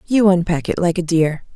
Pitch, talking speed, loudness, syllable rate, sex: 175 Hz, 230 wpm, -17 LUFS, 5.3 syllables/s, female